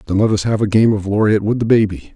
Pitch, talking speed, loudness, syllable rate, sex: 105 Hz, 305 wpm, -15 LUFS, 6.6 syllables/s, male